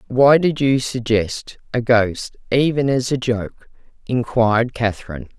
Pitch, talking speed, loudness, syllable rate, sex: 120 Hz, 135 wpm, -18 LUFS, 4.3 syllables/s, female